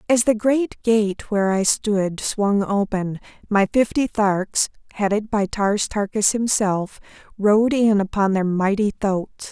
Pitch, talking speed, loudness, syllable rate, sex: 205 Hz, 145 wpm, -20 LUFS, 3.8 syllables/s, female